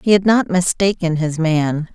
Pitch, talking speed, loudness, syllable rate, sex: 175 Hz, 185 wpm, -17 LUFS, 4.4 syllables/s, female